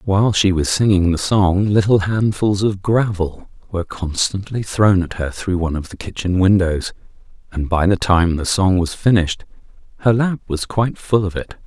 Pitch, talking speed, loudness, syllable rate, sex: 95 Hz, 185 wpm, -18 LUFS, 5.0 syllables/s, male